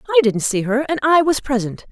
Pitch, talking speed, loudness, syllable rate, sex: 265 Hz, 250 wpm, -17 LUFS, 5.6 syllables/s, female